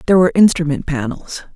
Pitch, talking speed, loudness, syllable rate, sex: 165 Hz, 155 wpm, -15 LUFS, 6.9 syllables/s, female